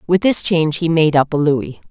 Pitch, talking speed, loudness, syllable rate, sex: 160 Hz, 250 wpm, -15 LUFS, 5.3 syllables/s, female